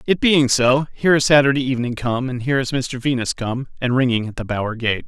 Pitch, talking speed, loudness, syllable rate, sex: 130 Hz, 235 wpm, -19 LUFS, 6.1 syllables/s, male